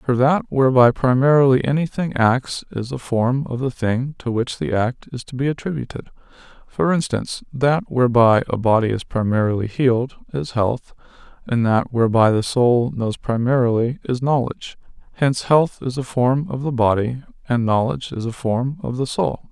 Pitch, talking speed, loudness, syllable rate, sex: 125 Hz, 170 wpm, -19 LUFS, 5.2 syllables/s, male